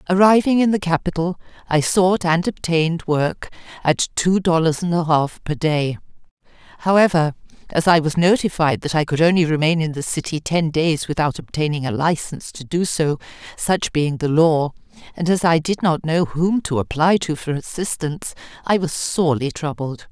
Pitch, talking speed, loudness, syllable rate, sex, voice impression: 160 Hz, 175 wpm, -19 LUFS, 5.0 syllables/s, female, feminine, middle-aged, tensed, powerful, clear, slightly halting, intellectual, calm, elegant, strict, slightly sharp